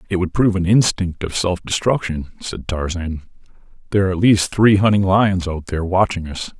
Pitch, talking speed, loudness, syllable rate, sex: 90 Hz, 190 wpm, -18 LUFS, 5.6 syllables/s, male